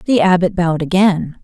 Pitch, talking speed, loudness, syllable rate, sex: 180 Hz, 170 wpm, -14 LUFS, 5.1 syllables/s, female